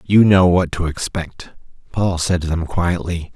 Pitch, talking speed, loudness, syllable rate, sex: 85 Hz, 180 wpm, -18 LUFS, 4.2 syllables/s, male